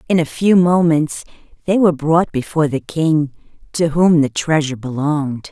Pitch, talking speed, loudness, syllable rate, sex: 155 Hz, 165 wpm, -16 LUFS, 5.1 syllables/s, female